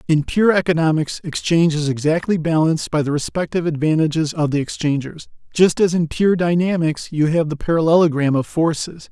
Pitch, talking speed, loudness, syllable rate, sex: 160 Hz, 165 wpm, -18 LUFS, 5.7 syllables/s, male